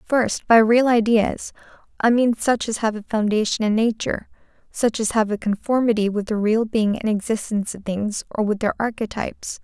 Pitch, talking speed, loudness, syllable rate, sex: 220 Hz, 185 wpm, -21 LUFS, 5.1 syllables/s, female